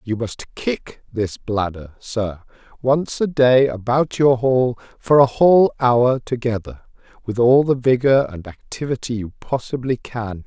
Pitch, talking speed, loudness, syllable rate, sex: 120 Hz, 150 wpm, -19 LUFS, 4.1 syllables/s, male